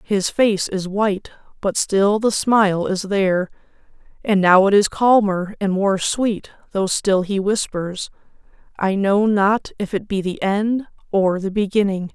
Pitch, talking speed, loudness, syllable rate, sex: 200 Hz, 165 wpm, -19 LUFS, 4.1 syllables/s, female